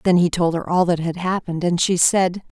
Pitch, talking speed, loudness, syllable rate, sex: 175 Hz, 255 wpm, -19 LUFS, 5.5 syllables/s, female